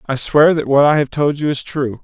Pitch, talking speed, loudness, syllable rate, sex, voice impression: 145 Hz, 295 wpm, -15 LUFS, 5.2 syllables/s, male, masculine, adult-like, thick, tensed, slightly hard, slightly muffled, raspy, cool, intellectual, calm, reassuring, wild, lively, modest